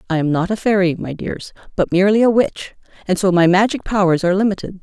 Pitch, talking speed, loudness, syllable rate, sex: 190 Hz, 225 wpm, -16 LUFS, 6.3 syllables/s, female